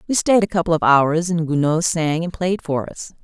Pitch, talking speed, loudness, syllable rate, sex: 165 Hz, 240 wpm, -18 LUFS, 5.1 syllables/s, female